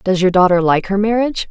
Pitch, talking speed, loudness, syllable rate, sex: 195 Hz, 240 wpm, -14 LUFS, 6.4 syllables/s, female